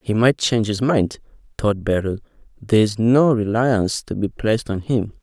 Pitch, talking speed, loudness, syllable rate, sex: 110 Hz, 170 wpm, -19 LUFS, 4.9 syllables/s, male